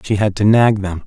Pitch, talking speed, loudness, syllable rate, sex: 100 Hz, 280 wpm, -15 LUFS, 5.2 syllables/s, male